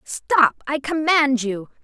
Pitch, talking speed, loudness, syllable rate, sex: 280 Hz, 100 wpm, -19 LUFS, 3.1 syllables/s, female